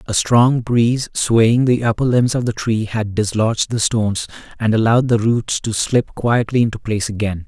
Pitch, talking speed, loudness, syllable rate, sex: 115 Hz, 195 wpm, -17 LUFS, 5.0 syllables/s, male